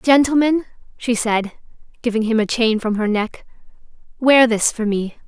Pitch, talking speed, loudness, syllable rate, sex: 230 Hz, 160 wpm, -18 LUFS, 4.6 syllables/s, female